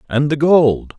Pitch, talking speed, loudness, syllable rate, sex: 145 Hz, 180 wpm, -14 LUFS, 3.8 syllables/s, male